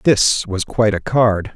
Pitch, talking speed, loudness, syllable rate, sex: 105 Hz, 195 wpm, -16 LUFS, 4.0 syllables/s, male